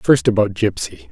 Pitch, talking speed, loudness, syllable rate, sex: 110 Hz, 160 wpm, -18 LUFS, 4.7 syllables/s, male